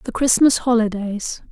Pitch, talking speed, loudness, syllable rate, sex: 230 Hz, 120 wpm, -18 LUFS, 4.6 syllables/s, female